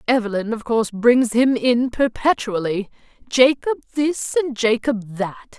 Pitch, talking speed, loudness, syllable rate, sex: 235 Hz, 120 wpm, -19 LUFS, 4.3 syllables/s, female